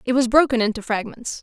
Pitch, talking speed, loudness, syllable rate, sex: 240 Hz, 210 wpm, -20 LUFS, 6.1 syllables/s, female